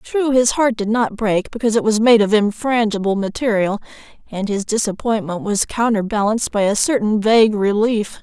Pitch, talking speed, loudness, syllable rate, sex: 215 Hz, 175 wpm, -17 LUFS, 5.3 syllables/s, female